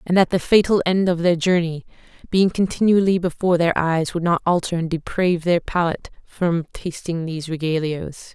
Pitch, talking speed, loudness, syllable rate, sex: 170 Hz, 170 wpm, -20 LUFS, 5.3 syllables/s, female